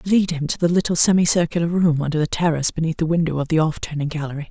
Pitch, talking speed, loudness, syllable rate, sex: 160 Hz, 255 wpm, -20 LUFS, 7.4 syllables/s, female